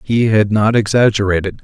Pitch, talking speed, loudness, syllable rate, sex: 105 Hz, 145 wpm, -14 LUFS, 5.2 syllables/s, male